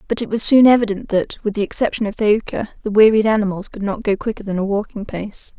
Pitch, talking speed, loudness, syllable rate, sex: 210 Hz, 235 wpm, -18 LUFS, 6.2 syllables/s, female